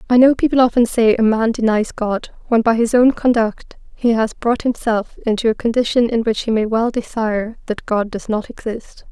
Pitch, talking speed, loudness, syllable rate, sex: 230 Hz, 210 wpm, -17 LUFS, 5.1 syllables/s, female